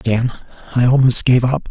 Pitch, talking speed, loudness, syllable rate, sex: 125 Hz, 175 wpm, -15 LUFS, 4.9 syllables/s, male